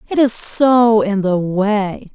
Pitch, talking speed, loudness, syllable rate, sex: 215 Hz, 170 wpm, -15 LUFS, 3.0 syllables/s, female